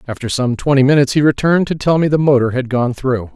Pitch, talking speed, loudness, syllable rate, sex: 135 Hz, 250 wpm, -15 LUFS, 6.6 syllables/s, male